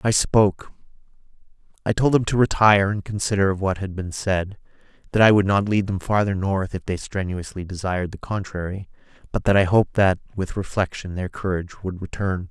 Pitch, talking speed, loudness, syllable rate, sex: 95 Hz, 185 wpm, -22 LUFS, 5.6 syllables/s, male